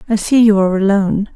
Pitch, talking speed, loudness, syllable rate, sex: 205 Hz, 220 wpm, -13 LUFS, 7.1 syllables/s, female